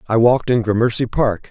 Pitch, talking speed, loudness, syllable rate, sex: 115 Hz, 200 wpm, -17 LUFS, 6.0 syllables/s, male